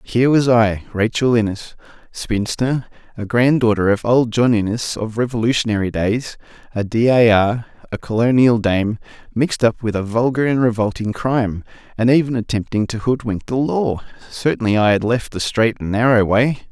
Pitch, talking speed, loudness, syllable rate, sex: 115 Hz, 165 wpm, -17 LUFS, 5.1 syllables/s, male